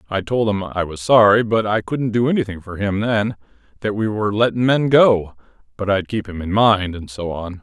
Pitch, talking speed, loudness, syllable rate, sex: 105 Hz, 230 wpm, -18 LUFS, 5.3 syllables/s, male